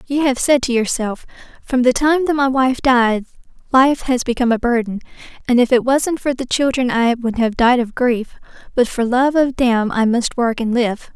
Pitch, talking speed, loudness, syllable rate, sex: 245 Hz, 215 wpm, -16 LUFS, 4.9 syllables/s, female